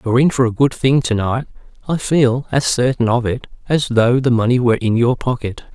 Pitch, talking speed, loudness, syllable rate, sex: 125 Hz, 230 wpm, -16 LUFS, 5.5 syllables/s, male